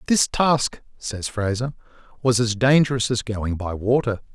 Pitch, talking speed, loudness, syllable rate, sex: 120 Hz, 150 wpm, -22 LUFS, 4.5 syllables/s, male